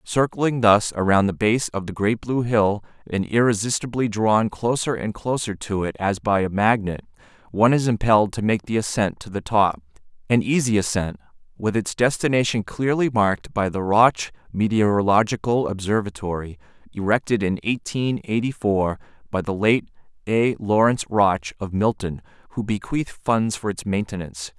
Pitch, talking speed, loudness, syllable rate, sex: 105 Hz, 155 wpm, -22 LUFS, 5.0 syllables/s, male